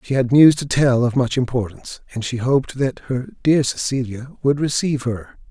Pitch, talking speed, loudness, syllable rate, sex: 130 Hz, 195 wpm, -19 LUFS, 5.3 syllables/s, male